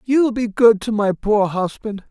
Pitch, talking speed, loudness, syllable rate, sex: 220 Hz, 230 wpm, -17 LUFS, 4.6 syllables/s, male